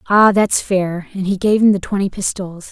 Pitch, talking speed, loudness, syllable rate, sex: 195 Hz, 220 wpm, -16 LUFS, 5.3 syllables/s, female